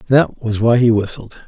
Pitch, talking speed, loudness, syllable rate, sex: 115 Hz, 205 wpm, -15 LUFS, 4.8 syllables/s, male